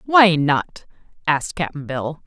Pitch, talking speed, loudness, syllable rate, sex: 160 Hz, 135 wpm, -19 LUFS, 3.4 syllables/s, female